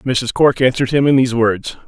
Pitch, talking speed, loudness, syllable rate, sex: 125 Hz, 225 wpm, -15 LUFS, 5.8 syllables/s, male